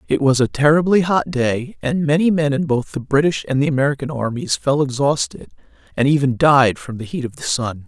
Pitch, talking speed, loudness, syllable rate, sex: 150 Hz, 215 wpm, -18 LUFS, 5.4 syllables/s, female